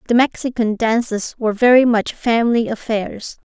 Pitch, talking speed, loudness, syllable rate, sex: 230 Hz, 135 wpm, -17 LUFS, 5.0 syllables/s, female